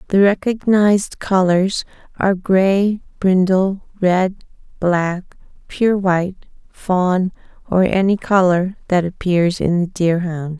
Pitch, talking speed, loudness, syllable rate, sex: 185 Hz, 110 wpm, -17 LUFS, 3.6 syllables/s, female